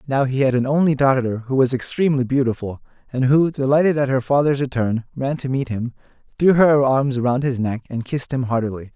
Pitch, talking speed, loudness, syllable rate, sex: 130 Hz, 210 wpm, -19 LUFS, 5.7 syllables/s, male